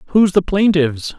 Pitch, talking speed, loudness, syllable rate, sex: 175 Hz, 150 wpm, -15 LUFS, 5.6 syllables/s, male